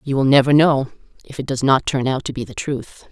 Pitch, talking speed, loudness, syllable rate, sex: 135 Hz, 270 wpm, -18 LUFS, 5.6 syllables/s, female